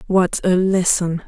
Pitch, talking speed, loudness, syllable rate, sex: 180 Hz, 140 wpm, -17 LUFS, 3.8 syllables/s, female